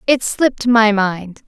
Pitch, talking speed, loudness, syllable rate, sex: 220 Hz, 165 wpm, -15 LUFS, 3.9 syllables/s, female